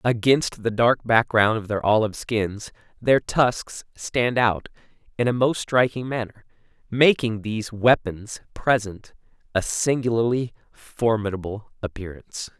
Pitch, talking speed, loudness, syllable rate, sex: 115 Hz, 120 wpm, -22 LUFS, 4.2 syllables/s, male